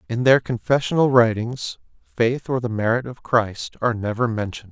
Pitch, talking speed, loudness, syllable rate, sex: 120 Hz, 165 wpm, -21 LUFS, 5.2 syllables/s, male